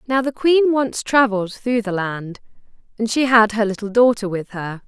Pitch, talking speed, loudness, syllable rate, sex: 225 Hz, 195 wpm, -18 LUFS, 4.8 syllables/s, female